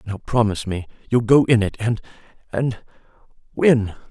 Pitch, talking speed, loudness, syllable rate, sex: 115 Hz, 115 wpm, -20 LUFS, 5.0 syllables/s, male